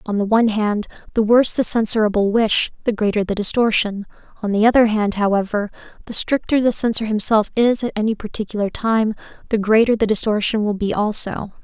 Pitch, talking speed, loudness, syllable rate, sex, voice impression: 215 Hz, 180 wpm, -18 LUFS, 5.8 syllables/s, female, feminine, young, tensed, bright, clear, fluent, cute, calm, friendly, slightly sweet, sharp